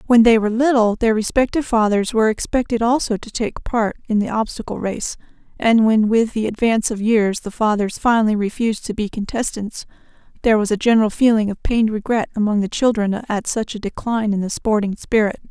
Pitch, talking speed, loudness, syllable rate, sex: 220 Hz, 195 wpm, -18 LUFS, 5.9 syllables/s, female